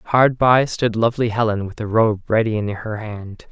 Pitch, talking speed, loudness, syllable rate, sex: 110 Hz, 205 wpm, -19 LUFS, 4.6 syllables/s, male